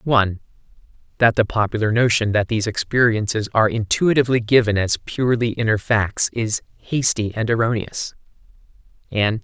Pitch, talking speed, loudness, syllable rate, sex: 110 Hz, 125 wpm, -19 LUFS, 5.5 syllables/s, male